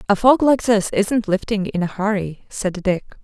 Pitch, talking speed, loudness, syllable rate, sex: 205 Hz, 205 wpm, -19 LUFS, 4.4 syllables/s, female